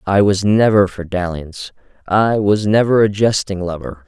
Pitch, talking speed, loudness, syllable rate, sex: 100 Hz, 160 wpm, -15 LUFS, 4.7 syllables/s, male